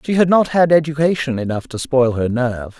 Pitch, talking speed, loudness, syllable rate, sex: 140 Hz, 215 wpm, -17 LUFS, 5.7 syllables/s, male